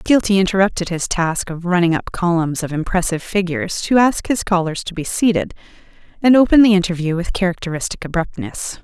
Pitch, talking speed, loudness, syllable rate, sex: 180 Hz, 170 wpm, -17 LUFS, 5.9 syllables/s, female